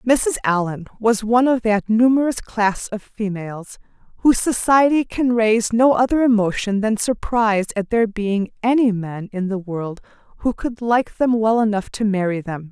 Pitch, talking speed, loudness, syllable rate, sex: 220 Hz, 170 wpm, -19 LUFS, 4.9 syllables/s, female